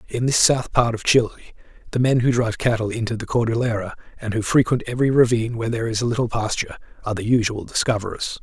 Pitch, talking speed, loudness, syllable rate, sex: 115 Hz, 205 wpm, -21 LUFS, 7.2 syllables/s, male